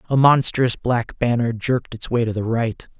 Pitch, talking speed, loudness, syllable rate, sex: 120 Hz, 200 wpm, -20 LUFS, 4.8 syllables/s, male